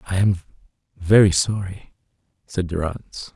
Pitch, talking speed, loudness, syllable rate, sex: 90 Hz, 105 wpm, -20 LUFS, 3.8 syllables/s, male